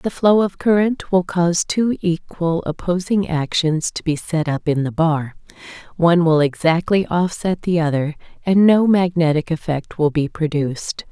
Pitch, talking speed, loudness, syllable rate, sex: 170 Hz, 160 wpm, -18 LUFS, 4.6 syllables/s, female